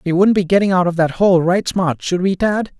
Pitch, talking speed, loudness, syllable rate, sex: 185 Hz, 280 wpm, -16 LUFS, 5.3 syllables/s, male